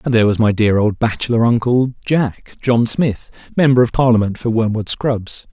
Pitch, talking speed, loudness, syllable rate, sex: 115 Hz, 175 wpm, -16 LUFS, 5.0 syllables/s, male